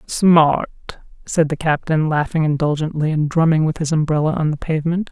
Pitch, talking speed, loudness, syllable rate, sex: 155 Hz, 165 wpm, -18 LUFS, 5.4 syllables/s, female